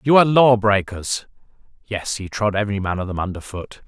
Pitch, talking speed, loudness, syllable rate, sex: 105 Hz, 200 wpm, -19 LUFS, 5.6 syllables/s, male